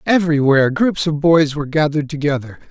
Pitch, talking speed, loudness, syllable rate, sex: 150 Hz, 155 wpm, -16 LUFS, 6.4 syllables/s, male